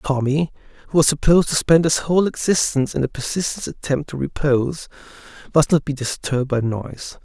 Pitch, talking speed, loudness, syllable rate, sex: 145 Hz, 175 wpm, -19 LUFS, 5.9 syllables/s, male